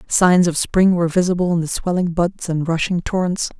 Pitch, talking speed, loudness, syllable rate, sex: 175 Hz, 200 wpm, -18 LUFS, 5.3 syllables/s, female